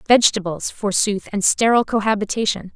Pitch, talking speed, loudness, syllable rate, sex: 210 Hz, 110 wpm, -19 LUFS, 5.9 syllables/s, female